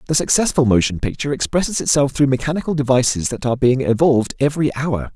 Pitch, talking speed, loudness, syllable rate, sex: 135 Hz, 175 wpm, -17 LUFS, 6.8 syllables/s, male